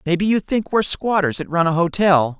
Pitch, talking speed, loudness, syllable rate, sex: 180 Hz, 225 wpm, -18 LUFS, 5.7 syllables/s, male